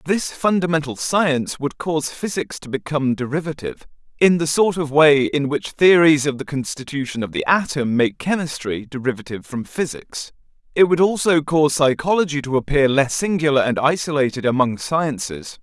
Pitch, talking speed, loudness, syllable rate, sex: 145 Hz, 155 wpm, -19 LUFS, 5.3 syllables/s, male